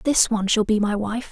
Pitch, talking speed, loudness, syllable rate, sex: 220 Hz, 275 wpm, -20 LUFS, 5.9 syllables/s, female